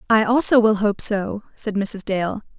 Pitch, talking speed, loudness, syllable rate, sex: 210 Hz, 185 wpm, -19 LUFS, 4.3 syllables/s, female